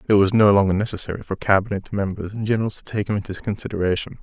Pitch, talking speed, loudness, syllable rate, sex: 100 Hz, 215 wpm, -21 LUFS, 7.2 syllables/s, male